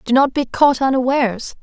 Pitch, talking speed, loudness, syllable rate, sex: 260 Hz, 185 wpm, -16 LUFS, 5.4 syllables/s, female